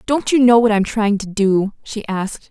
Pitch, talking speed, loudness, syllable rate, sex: 215 Hz, 240 wpm, -16 LUFS, 4.7 syllables/s, female